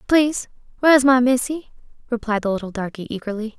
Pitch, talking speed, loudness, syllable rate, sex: 240 Hz, 165 wpm, -20 LUFS, 6.3 syllables/s, female